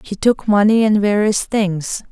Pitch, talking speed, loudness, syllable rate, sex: 205 Hz, 170 wpm, -16 LUFS, 4.1 syllables/s, female